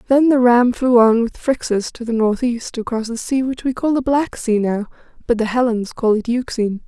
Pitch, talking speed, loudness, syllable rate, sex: 240 Hz, 225 wpm, -18 LUFS, 5.1 syllables/s, female